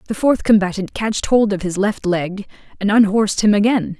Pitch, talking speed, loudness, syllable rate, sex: 205 Hz, 195 wpm, -17 LUFS, 4.9 syllables/s, female